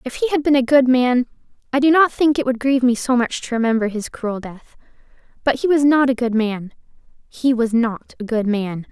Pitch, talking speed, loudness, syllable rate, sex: 250 Hz, 230 wpm, -18 LUFS, 5.5 syllables/s, female